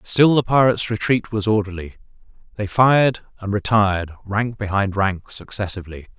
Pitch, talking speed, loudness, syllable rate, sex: 105 Hz, 135 wpm, -19 LUFS, 5.3 syllables/s, male